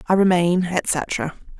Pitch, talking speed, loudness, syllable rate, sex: 175 Hz, 115 wpm, -20 LUFS, 3.3 syllables/s, female